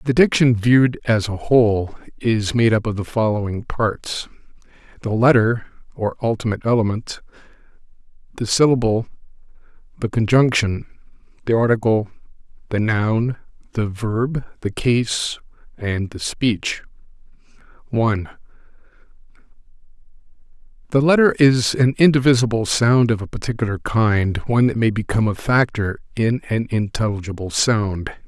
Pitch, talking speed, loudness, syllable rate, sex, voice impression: 115 Hz, 115 wpm, -19 LUFS, 4.5 syllables/s, male, masculine, middle-aged, slightly thick, slightly relaxed, powerful, slightly hard, muffled, slightly raspy, intellectual, mature, wild, slightly strict